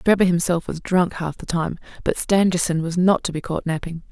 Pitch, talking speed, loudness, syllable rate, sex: 170 Hz, 220 wpm, -21 LUFS, 5.4 syllables/s, female